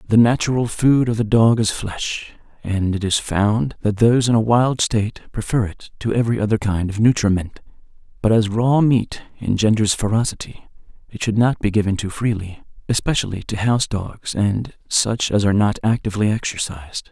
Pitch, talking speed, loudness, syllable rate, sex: 110 Hz, 175 wpm, -19 LUFS, 5.3 syllables/s, male